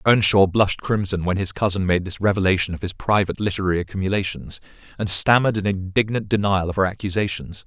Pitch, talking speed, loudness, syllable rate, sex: 95 Hz, 170 wpm, -21 LUFS, 6.4 syllables/s, male